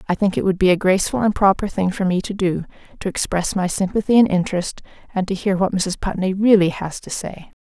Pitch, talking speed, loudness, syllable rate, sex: 190 Hz, 235 wpm, -19 LUFS, 5.9 syllables/s, female